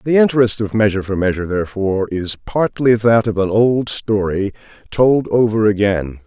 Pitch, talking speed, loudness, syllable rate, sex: 105 Hz, 165 wpm, -16 LUFS, 5.2 syllables/s, male